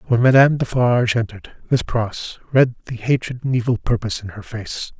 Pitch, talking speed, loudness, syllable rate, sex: 120 Hz, 180 wpm, -19 LUFS, 5.6 syllables/s, male